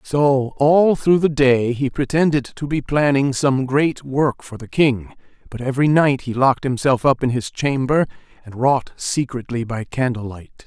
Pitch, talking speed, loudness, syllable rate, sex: 135 Hz, 180 wpm, -18 LUFS, 4.5 syllables/s, male